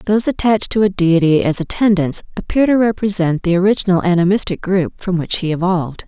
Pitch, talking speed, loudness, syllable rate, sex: 185 Hz, 180 wpm, -16 LUFS, 6.0 syllables/s, female